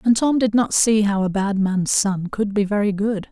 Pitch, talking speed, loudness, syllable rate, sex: 205 Hz, 255 wpm, -19 LUFS, 4.7 syllables/s, female